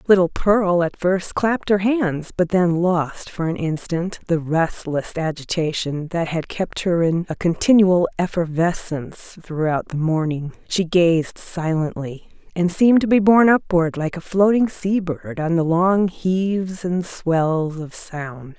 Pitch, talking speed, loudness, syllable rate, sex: 175 Hz, 160 wpm, -20 LUFS, 4.0 syllables/s, female